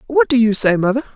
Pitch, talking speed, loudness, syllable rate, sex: 240 Hz, 260 wpm, -15 LUFS, 6.9 syllables/s, female